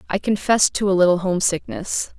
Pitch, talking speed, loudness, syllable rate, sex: 190 Hz, 165 wpm, -19 LUFS, 6.2 syllables/s, female